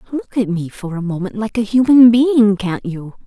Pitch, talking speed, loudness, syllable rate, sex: 210 Hz, 220 wpm, -15 LUFS, 4.8 syllables/s, female